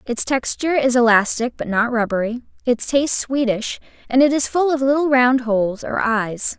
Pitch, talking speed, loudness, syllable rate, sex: 250 Hz, 180 wpm, -18 LUFS, 5.1 syllables/s, female